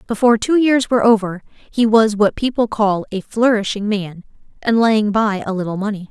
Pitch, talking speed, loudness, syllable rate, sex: 215 Hz, 185 wpm, -16 LUFS, 5.2 syllables/s, female